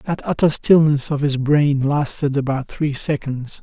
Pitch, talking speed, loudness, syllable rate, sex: 145 Hz, 165 wpm, -18 LUFS, 4.2 syllables/s, male